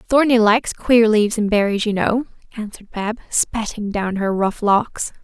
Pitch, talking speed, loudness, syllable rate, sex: 215 Hz, 170 wpm, -18 LUFS, 4.8 syllables/s, female